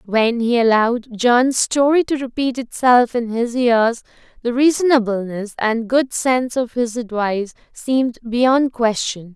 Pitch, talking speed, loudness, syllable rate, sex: 240 Hz, 140 wpm, -17 LUFS, 4.2 syllables/s, female